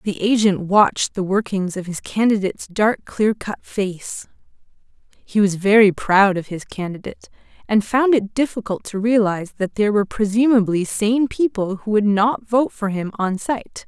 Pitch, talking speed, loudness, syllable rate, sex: 210 Hz, 170 wpm, -19 LUFS, 4.8 syllables/s, female